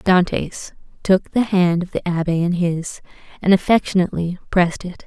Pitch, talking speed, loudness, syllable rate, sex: 180 Hz, 155 wpm, -19 LUFS, 5.0 syllables/s, female